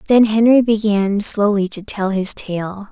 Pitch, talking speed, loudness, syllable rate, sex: 205 Hz, 165 wpm, -16 LUFS, 4.0 syllables/s, female